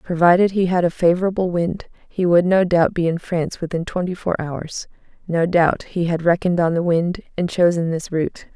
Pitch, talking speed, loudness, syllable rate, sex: 175 Hz, 205 wpm, -19 LUFS, 5.3 syllables/s, female